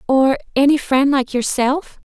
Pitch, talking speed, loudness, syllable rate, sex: 270 Hz, 110 wpm, -17 LUFS, 4.1 syllables/s, female